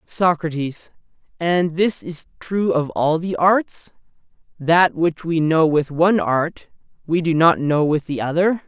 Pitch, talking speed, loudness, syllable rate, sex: 165 Hz, 150 wpm, -19 LUFS, 3.9 syllables/s, male